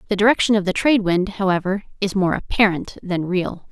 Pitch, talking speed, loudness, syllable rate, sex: 195 Hz, 195 wpm, -19 LUFS, 5.8 syllables/s, female